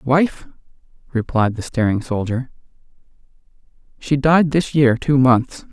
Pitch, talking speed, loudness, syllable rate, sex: 130 Hz, 115 wpm, -18 LUFS, 3.9 syllables/s, male